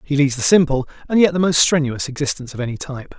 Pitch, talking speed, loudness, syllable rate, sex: 145 Hz, 245 wpm, -17 LUFS, 7.0 syllables/s, male